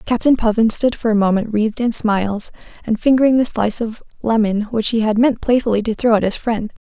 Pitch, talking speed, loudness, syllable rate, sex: 225 Hz, 220 wpm, -17 LUFS, 5.8 syllables/s, female